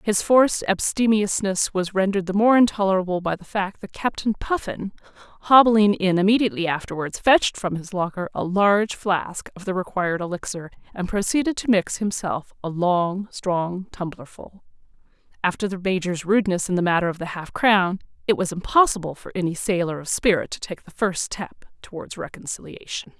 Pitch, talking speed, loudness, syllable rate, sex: 190 Hz, 165 wpm, -22 LUFS, 5.4 syllables/s, female